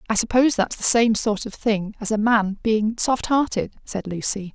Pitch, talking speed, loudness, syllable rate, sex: 220 Hz, 210 wpm, -21 LUFS, 4.8 syllables/s, female